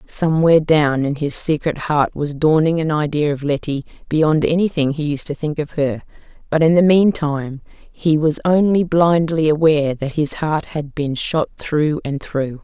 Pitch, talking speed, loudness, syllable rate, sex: 150 Hz, 185 wpm, -17 LUFS, 4.5 syllables/s, female